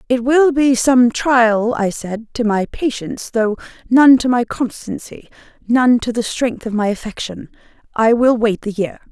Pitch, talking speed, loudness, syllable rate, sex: 235 Hz, 170 wpm, -16 LUFS, 4.3 syllables/s, female